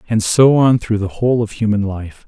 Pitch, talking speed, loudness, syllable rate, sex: 110 Hz, 240 wpm, -15 LUFS, 5.2 syllables/s, male